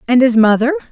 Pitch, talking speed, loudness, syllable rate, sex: 245 Hz, 195 wpm, -12 LUFS, 6.9 syllables/s, female